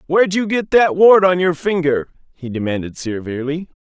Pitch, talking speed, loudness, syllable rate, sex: 160 Hz, 175 wpm, -16 LUFS, 5.4 syllables/s, male